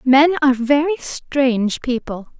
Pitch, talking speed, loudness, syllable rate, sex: 270 Hz, 125 wpm, -17 LUFS, 4.2 syllables/s, female